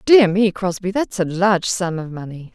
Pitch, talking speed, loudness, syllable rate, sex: 190 Hz, 210 wpm, -18 LUFS, 4.9 syllables/s, female